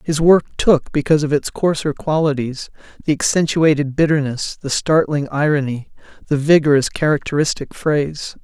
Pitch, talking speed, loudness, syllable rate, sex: 150 Hz, 130 wpm, -17 LUFS, 5.2 syllables/s, male